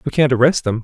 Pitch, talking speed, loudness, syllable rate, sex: 130 Hz, 290 wpm, -15 LUFS, 6.9 syllables/s, male